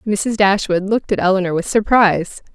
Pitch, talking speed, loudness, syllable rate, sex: 195 Hz, 165 wpm, -16 LUFS, 5.6 syllables/s, female